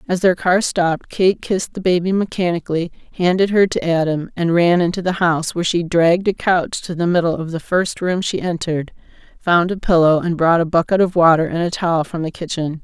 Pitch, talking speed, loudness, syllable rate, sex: 175 Hz, 220 wpm, -17 LUFS, 5.7 syllables/s, female